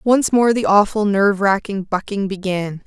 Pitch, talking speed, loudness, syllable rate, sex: 200 Hz, 165 wpm, -17 LUFS, 4.7 syllables/s, female